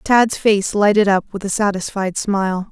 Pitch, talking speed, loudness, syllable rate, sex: 200 Hz, 175 wpm, -17 LUFS, 4.6 syllables/s, female